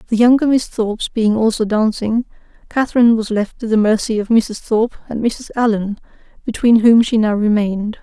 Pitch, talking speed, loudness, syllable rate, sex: 220 Hz, 180 wpm, -16 LUFS, 5.5 syllables/s, female